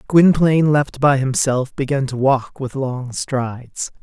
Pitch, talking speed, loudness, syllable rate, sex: 135 Hz, 150 wpm, -18 LUFS, 4.0 syllables/s, male